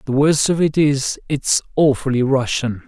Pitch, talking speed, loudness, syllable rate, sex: 140 Hz, 165 wpm, -17 LUFS, 4.4 syllables/s, male